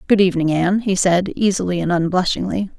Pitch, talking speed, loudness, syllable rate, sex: 185 Hz, 175 wpm, -18 LUFS, 6.2 syllables/s, female